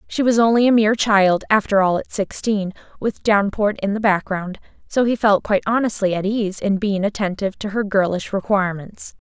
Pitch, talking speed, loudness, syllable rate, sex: 205 Hz, 190 wpm, -19 LUFS, 5.4 syllables/s, female